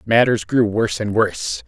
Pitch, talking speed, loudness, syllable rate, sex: 110 Hz, 180 wpm, -18 LUFS, 5.1 syllables/s, male